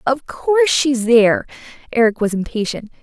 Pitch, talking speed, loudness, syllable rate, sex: 250 Hz, 140 wpm, -16 LUFS, 5.1 syllables/s, female